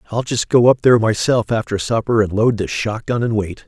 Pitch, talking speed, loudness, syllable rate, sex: 110 Hz, 245 wpm, -17 LUFS, 5.5 syllables/s, male